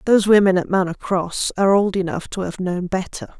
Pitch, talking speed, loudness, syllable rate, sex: 190 Hz, 210 wpm, -19 LUFS, 5.6 syllables/s, female